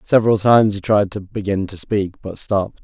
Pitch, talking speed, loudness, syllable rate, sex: 100 Hz, 210 wpm, -18 LUFS, 5.5 syllables/s, male